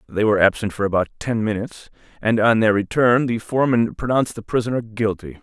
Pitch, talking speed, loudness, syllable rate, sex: 110 Hz, 190 wpm, -20 LUFS, 6.2 syllables/s, male